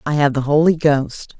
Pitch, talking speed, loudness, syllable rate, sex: 145 Hz, 215 wpm, -16 LUFS, 4.8 syllables/s, female